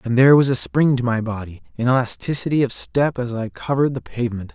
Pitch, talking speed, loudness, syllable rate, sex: 125 Hz, 225 wpm, -20 LUFS, 6.3 syllables/s, male